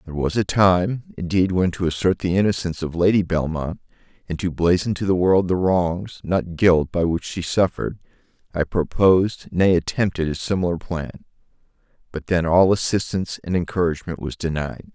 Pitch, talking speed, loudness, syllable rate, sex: 90 Hz, 170 wpm, -21 LUFS, 5.3 syllables/s, male